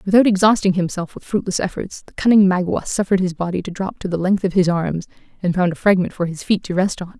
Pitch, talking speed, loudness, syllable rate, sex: 185 Hz, 250 wpm, -19 LUFS, 6.3 syllables/s, female